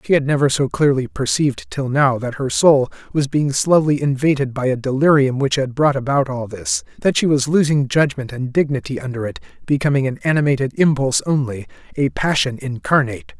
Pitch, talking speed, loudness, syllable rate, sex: 135 Hz, 185 wpm, -18 LUFS, 5.6 syllables/s, male